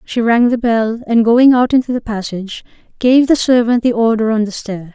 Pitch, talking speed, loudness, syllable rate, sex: 230 Hz, 220 wpm, -13 LUFS, 5.2 syllables/s, female